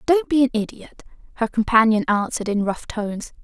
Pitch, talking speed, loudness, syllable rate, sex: 230 Hz, 175 wpm, -20 LUFS, 5.7 syllables/s, female